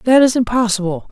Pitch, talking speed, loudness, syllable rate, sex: 220 Hz, 160 wpm, -15 LUFS, 5.6 syllables/s, male